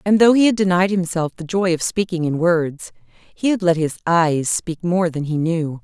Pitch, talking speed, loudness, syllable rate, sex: 170 Hz, 225 wpm, -18 LUFS, 4.6 syllables/s, female